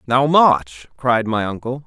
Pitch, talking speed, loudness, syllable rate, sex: 125 Hz, 160 wpm, -17 LUFS, 3.7 syllables/s, male